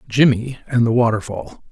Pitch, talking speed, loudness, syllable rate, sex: 115 Hz, 140 wpm, -18 LUFS, 5.0 syllables/s, male